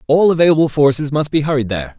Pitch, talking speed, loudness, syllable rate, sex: 140 Hz, 210 wpm, -15 LUFS, 7.1 syllables/s, male